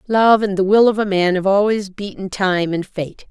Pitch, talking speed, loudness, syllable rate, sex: 195 Hz, 235 wpm, -17 LUFS, 4.8 syllables/s, female